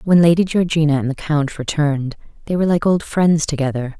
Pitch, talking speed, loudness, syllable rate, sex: 155 Hz, 195 wpm, -17 LUFS, 5.9 syllables/s, female